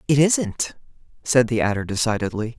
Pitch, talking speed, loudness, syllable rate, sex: 120 Hz, 140 wpm, -21 LUFS, 5.1 syllables/s, male